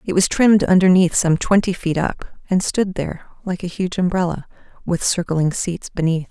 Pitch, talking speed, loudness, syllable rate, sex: 180 Hz, 180 wpm, -18 LUFS, 5.0 syllables/s, female